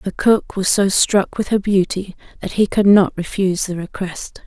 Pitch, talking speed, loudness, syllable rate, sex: 190 Hz, 200 wpm, -17 LUFS, 4.6 syllables/s, female